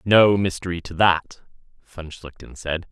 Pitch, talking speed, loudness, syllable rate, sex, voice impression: 90 Hz, 145 wpm, -20 LUFS, 4.1 syllables/s, male, very masculine, very adult-like, slightly middle-aged, very thick, slightly tensed, slightly powerful, bright, hard, clear, fluent, very cool, intellectual, very refreshing, very sincere, calm, slightly mature, friendly, reassuring, elegant, slightly wild, slightly sweet, lively, slightly strict, slightly intense